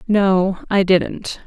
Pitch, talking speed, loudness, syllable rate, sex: 190 Hz, 125 wpm, -17 LUFS, 2.5 syllables/s, female